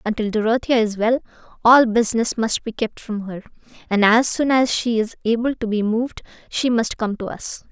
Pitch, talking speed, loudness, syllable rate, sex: 225 Hz, 200 wpm, -19 LUFS, 5.2 syllables/s, female